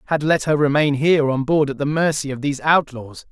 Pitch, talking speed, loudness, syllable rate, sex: 145 Hz, 235 wpm, -18 LUFS, 5.8 syllables/s, male